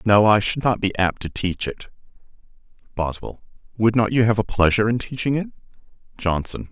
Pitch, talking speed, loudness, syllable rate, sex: 105 Hz, 180 wpm, -21 LUFS, 5.5 syllables/s, male